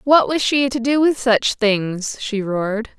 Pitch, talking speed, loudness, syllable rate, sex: 235 Hz, 200 wpm, -18 LUFS, 3.9 syllables/s, female